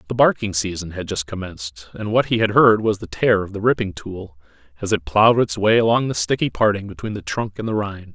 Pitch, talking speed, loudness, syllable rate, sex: 100 Hz, 245 wpm, -19 LUFS, 5.7 syllables/s, male